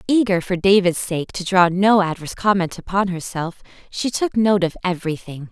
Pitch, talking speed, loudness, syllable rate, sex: 185 Hz, 175 wpm, -19 LUFS, 5.2 syllables/s, female